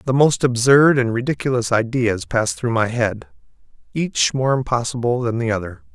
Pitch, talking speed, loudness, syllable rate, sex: 120 Hz, 160 wpm, -18 LUFS, 5.1 syllables/s, male